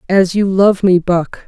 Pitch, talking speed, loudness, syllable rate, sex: 190 Hz, 205 wpm, -13 LUFS, 4.1 syllables/s, female